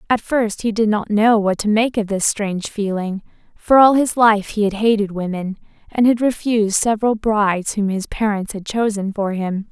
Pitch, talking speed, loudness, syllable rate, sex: 210 Hz, 205 wpm, -18 LUFS, 4.9 syllables/s, female